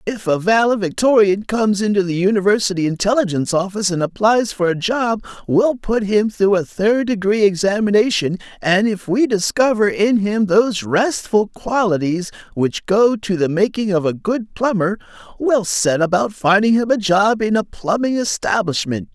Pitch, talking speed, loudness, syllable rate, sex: 205 Hz, 160 wpm, -17 LUFS, 4.9 syllables/s, male